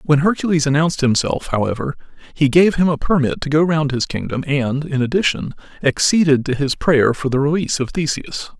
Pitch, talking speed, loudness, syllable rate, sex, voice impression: 145 Hz, 190 wpm, -17 LUFS, 5.6 syllables/s, male, masculine, very adult-like, slightly thick, fluent, cool, slightly intellectual